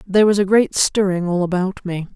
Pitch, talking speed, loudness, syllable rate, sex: 190 Hz, 225 wpm, -18 LUFS, 5.7 syllables/s, female